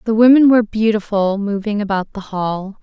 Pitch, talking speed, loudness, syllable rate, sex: 210 Hz, 170 wpm, -16 LUFS, 5.3 syllables/s, female